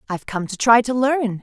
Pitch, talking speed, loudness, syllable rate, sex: 230 Hz, 255 wpm, -18 LUFS, 5.6 syllables/s, female